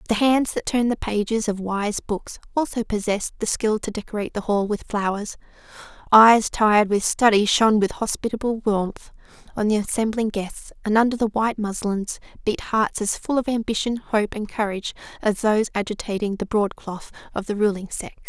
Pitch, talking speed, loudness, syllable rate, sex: 215 Hz, 175 wpm, -22 LUFS, 5.4 syllables/s, female